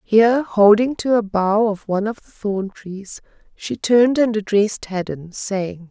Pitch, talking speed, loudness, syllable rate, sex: 210 Hz, 175 wpm, -18 LUFS, 4.4 syllables/s, female